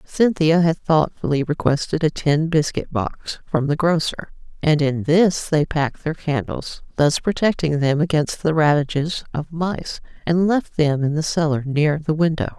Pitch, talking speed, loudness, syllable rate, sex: 155 Hz, 165 wpm, -20 LUFS, 4.4 syllables/s, female